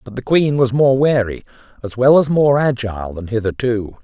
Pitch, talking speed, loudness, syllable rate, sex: 120 Hz, 195 wpm, -16 LUFS, 5.1 syllables/s, male